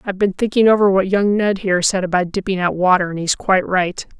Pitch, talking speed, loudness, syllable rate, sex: 190 Hz, 245 wpm, -17 LUFS, 6.3 syllables/s, female